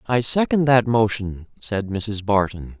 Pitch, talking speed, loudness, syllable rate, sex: 110 Hz, 150 wpm, -20 LUFS, 3.9 syllables/s, male